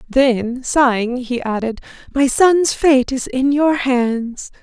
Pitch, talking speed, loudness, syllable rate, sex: 260 Hz, 145 wpm, -16 LUFS, 3.2 syllables/s, female